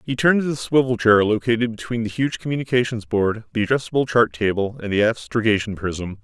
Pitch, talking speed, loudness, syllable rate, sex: 115 Hz, 195 wpm, -20 LUFS, 6.0 syllables/s, male